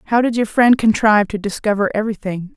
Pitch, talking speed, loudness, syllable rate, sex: 215 Hz, 190 wpm, -16 LUFS, 6.4 syllables/s, female